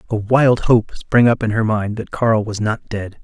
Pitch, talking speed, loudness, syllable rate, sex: 110 Hz, 240 wpm, -17 LUFS, 4.3 syllables/s, male